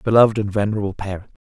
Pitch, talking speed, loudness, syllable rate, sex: 105 Hz, 170 wpm, -20 LUFS, 7.8 syllables/s, male